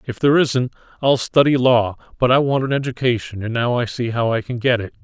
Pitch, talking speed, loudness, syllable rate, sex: 125 Hz, 240 wpm, -18 LUFS, 5.7 syllables/s, male